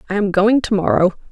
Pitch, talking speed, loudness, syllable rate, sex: 195 Hz, 230 wpm, -16 LUFS, 5.8 syllables/s, female